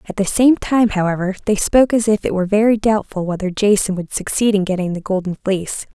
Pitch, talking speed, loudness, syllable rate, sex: 200 Hz, 220 wpm, -17 LUFS, 6.1 syllables/s, female